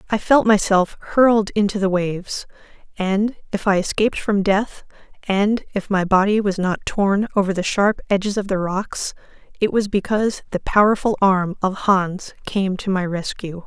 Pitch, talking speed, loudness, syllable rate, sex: 200 Hz, 170 wpm, -19 LUFS, 4.7 syllables/s, female